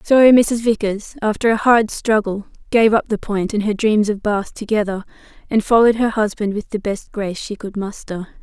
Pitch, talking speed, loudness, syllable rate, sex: 215 Hz, 200 wpm, -18 LUFS, 5.1 syllables/s, female